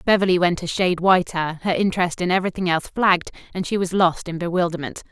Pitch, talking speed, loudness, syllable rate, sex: 175 Hz, 200 wpm, -21 LUFS, 6.7 syllables/s, female